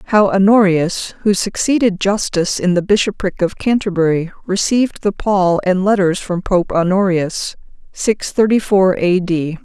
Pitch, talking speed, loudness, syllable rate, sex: 190 Hz, 145 wpm, -15 LUFS, 4.0 syllables/s, female